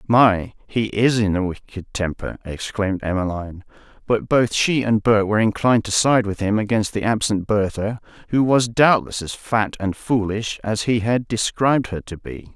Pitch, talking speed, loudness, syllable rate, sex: 105 Hz, 180 wpm, -20 LUFS, 4.8 syllables/s, male